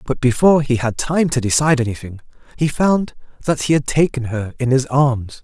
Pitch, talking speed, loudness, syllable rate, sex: 135 Hz, 200 wpm, -17 LUFS, 5.4 syllables/s, male